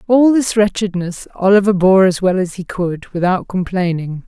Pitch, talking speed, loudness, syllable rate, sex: 190 Hz, 170 wpm, -15 LUFS, 4.7 syllables/s, female